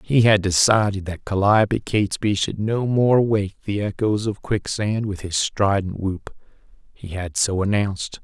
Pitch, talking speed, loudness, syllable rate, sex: 100 Hz, 160 wpm, -21 LUFS, 4.4 syllables/s, male